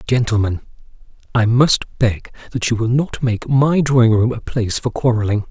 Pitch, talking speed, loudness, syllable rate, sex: 120 Hz, 175 wpm, -17 LUFS, 5.0 syllables/s, male